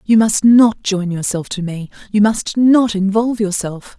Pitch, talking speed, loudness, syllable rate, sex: 205 Hz, 180 wpm, -15 LUFS, 4.4 syllables/s, female